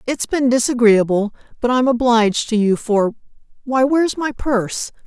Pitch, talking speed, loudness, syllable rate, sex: 240 Hz, 140 wpm, -17 LUFS, 5.0 syllables/s, female